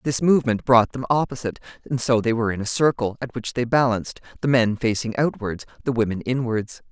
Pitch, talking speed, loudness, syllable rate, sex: 120 Hz, 200 wpm, -22 LUFS, 6.0 syllables/s, female